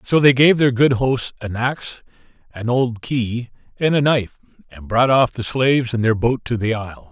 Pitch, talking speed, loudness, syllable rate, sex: 120 Hz, 210 wpm, -18 LUFS, 4.9 syllables/s, male